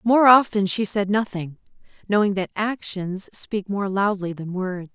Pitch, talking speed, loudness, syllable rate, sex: 200 Hz, 160 wpm, -22 LUFS, 4.3 syllables/s, female